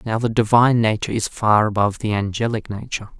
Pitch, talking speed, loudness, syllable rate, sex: 110 Hz, 190 wpm, -19 LUFS, 6.6 syllables/s, male